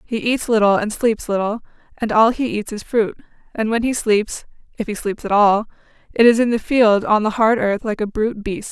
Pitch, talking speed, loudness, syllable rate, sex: 220 Hz, 235 wpm, -18 LUFS, 5.2 syllables/s, female